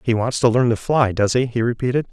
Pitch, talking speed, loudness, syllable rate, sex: 120 Hz, 285 wpm, -19 LUFS, 6.0 syllables/s, male